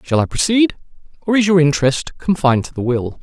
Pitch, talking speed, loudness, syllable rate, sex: 160 Hz, 205 wpm, -16 LUFS, 6.0 syllables/s, male